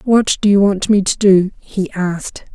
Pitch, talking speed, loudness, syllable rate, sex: 195 Hz, 210 wpm, -14 LUFS, 4.4 syllables/s, female